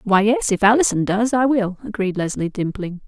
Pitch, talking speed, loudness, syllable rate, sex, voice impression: 210 Hz, 195 wpm, -19 LUFS, 5.2 syllables/s, female, feminine, adult-like, fluent, intellectual, calm, slightly sweet